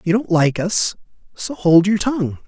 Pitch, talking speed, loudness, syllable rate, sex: 190 Hz, 195 wpm, -17 LUFS, 4.6 syllables/s, male